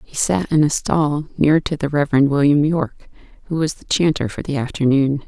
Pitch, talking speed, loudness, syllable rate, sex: 145 Hz, 205 wpm, -18 LUFS, 5.4 syllables/s, female